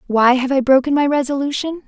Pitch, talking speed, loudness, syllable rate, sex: 270 Hz, 190 wpm, -16 LUFS, 6.0 syllables/s, female